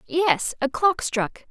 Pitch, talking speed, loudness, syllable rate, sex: 300 Hz, 160 wpm, -22 LUFS, 3.1 syllables/s, female